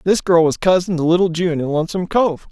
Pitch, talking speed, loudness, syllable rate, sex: 170 Hz, 240 wpm, -17 LUFS, 6.3 syllables/s, male